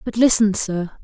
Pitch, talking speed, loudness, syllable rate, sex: 205 Hz, 175 wpm, -17 LUFS, 4.3 syllables/s, female